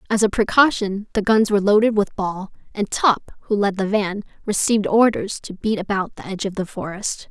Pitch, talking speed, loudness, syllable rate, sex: 205 Hz, 205 wpm, -20 LUFS, 5.5 syllables/s, female